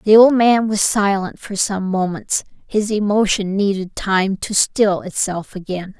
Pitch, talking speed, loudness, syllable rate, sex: 200 Hz, 160 wpm, -17 LUFS, 4.1 syllables/s, female